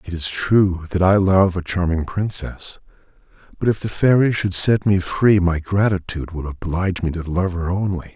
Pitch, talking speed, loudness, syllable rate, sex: 90 Hz, 190 wpm, -19 LUFS, 4.9 syllables/s, male